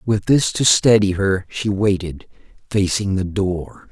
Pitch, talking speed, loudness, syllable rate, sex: 100 Hz, 155 wpm, -18 LUFS, 3.9 syllables/s, male